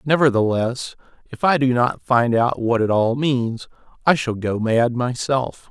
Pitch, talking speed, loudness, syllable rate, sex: 125 Hz, 170 wpm, -19 LUFS, 4.0 syllables/s, male